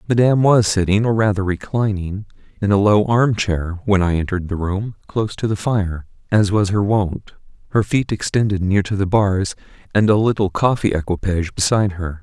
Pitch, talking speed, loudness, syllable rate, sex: 100 Hz, 185 wpm, -18 LUFS, 5.3 syllables/s, male